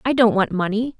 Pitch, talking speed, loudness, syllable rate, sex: 225 Hz, 240 wpm, -19 LUFS, 5.6 syllables/s, female